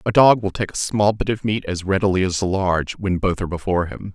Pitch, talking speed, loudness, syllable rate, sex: 95 Hz, 275 wpm, -20 LUFS, 6.2 syllables/s, male